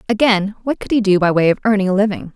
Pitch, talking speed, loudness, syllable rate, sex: 200 Hz, 280 wpm, -16 LUFS, 6.9 syllables/s, female